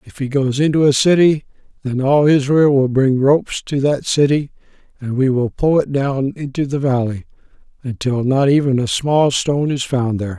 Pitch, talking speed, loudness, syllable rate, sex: 135 Hz, 190 wpm, -16 LUFS, 5.0 syllables/s, male